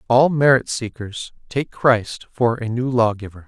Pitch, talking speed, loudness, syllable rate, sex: 120 Hz, 155 wpm, -19 LUFS, 4.2 syllables/s, male